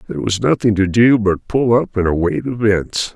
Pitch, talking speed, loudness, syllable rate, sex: 105 Hz, 210 wpm, -16 LUFS, 5.1 syllables/s, male